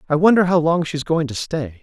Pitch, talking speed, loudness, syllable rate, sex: 155 Hz, 265 wpm, -18 LUFS, 5.6 syllables/s, male